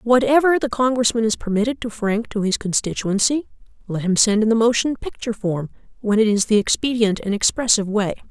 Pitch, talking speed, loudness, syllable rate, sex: 225 Hz, 190 wpm, -19 LUFS, 5.8 syllables/s, female